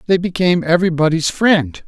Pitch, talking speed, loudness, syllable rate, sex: 170 Hz, 130 wpm, -15 LUFS, 5.9 syllables/s, male